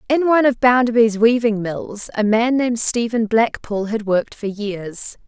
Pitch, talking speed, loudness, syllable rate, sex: 225 Hz, 170 wpm, -18 LUFS, 4.6 syllables/s, female